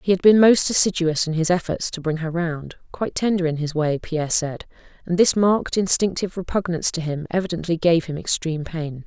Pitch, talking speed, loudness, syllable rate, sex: 170 Hz, 205 wpm, -21 LUFS, 5.9 syllables/s, female